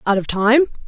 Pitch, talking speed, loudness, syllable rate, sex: 230 Hz, 205 wpm, -16 LUFS, 5.4 syllables/s, female